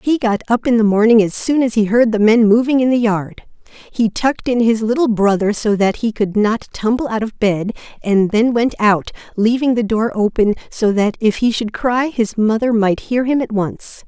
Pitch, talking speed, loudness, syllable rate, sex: 225 Hz, 225 wpm, -16 LUFS, 4.8 syllables/s, female